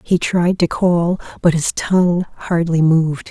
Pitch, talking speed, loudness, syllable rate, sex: 170 Hz, 165 wpm, -16 LUFS, 4.3 syllables/s, female